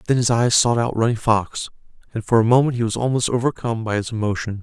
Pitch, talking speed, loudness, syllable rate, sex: 115 Hz, 235 wpm, -19 LUFS, 6.5 syllables/s, male